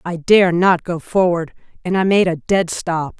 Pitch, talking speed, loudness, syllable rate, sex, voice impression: 175 Hz, 205 wpm, -16 LUFS, 4.3 syllables/s, female, very feminine, middle-aged, thin, tensed, powerful, slightly bright, hard, clear, fluent, cool, very intellectual, refreshing, sincere, very calm, friendly, reassuring, unique, slightly elegant, wild, slightly sweet, lively, strict, slightly intense, sharp